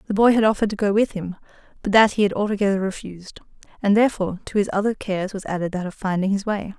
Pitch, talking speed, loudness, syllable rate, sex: 200 Hz, 230 wpm, -21 LUFS, 7.3 syllables/s, female